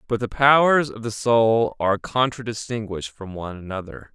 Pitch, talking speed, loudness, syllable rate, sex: 115 Hz, 160 wpm, -21 LUFS, 5.3 syllables/s, male